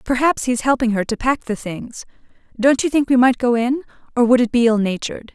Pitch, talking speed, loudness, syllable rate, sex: 245 Hz, 235 wpm, -18 LUFS, 5.7 syllables/s, female